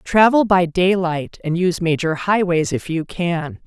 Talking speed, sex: 165 wpm, female